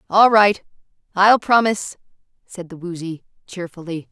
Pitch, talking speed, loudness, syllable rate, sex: 190 Hz, 115 wpm, -17 LUFS, 4.8 syllables/s, female